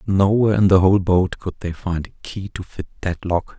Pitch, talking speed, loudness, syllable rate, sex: 95 Hz, 250 wpm, -19 LUFS, 5.7 syllables/s, male